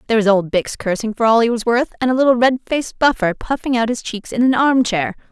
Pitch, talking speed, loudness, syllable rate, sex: 230 Hz, 260 wpm, -17 LUFS, 6.3 syllables/s, female